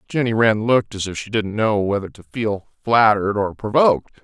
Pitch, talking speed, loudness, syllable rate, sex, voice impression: 105 Hz, 200 wpm, -19 LUFS, 5.6 syllables/s, male, very masculine, very adult-like, thick, tensed, slightly powerful, very bright, soft, clear, fluent, cool, intellectual, very refreshing, very sincere, slightly calm, friendly, reassuring, unique, slightly elegant, wild, sweet, very lively, kind, slightly intense